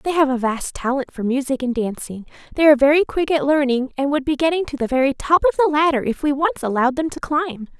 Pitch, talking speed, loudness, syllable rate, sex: 280 Hz, 255 wpm, -19 LUFS, 6.3 syllables/s, female